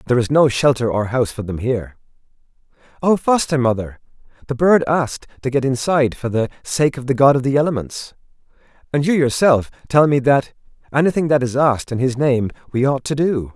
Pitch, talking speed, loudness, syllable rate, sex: 130 Hz, 195 wpm, -18 LUFS, 5.9 syllables/s, male